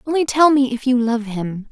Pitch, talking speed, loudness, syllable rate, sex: 250 Hz, 245 wpm, -17 LUFS, 5.0 syllables/s, female